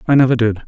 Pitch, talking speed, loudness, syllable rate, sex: 120 Hz, 270 wpm, -14 LUFS, 8.3 syllables/s, male